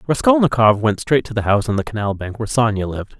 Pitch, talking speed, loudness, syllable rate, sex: 115 Hz, 245 wpm, -18 LUFS, 6.9 syllables/s, male